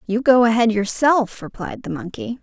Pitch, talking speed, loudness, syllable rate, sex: 215 Hz, 175 wpm, -18 LUFS, 4.8 syllables/s, female